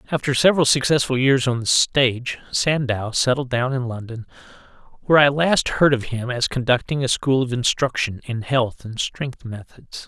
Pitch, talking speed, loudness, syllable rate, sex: 130 Hz, 175 wpm, -20 LUFS, 4.9 syllables/s, male